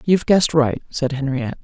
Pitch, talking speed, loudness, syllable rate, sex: 145 Hz, 185 wpm, -18 LUFS, 6.3 syllables/s, female